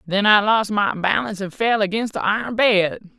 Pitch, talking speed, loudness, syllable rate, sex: 205 Hz, 205 wpm, -19 LUFS, 5.1 syllables/s, female